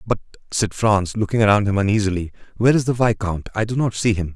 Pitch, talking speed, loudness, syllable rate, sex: 105 Hz, 205 wpm, -20 LUFS, 6.1 syllables/s, male